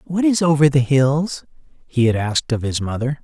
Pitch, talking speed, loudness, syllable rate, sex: 140 Hz, 205 wpm, -18 LUFS, 5.2 syllables/s, male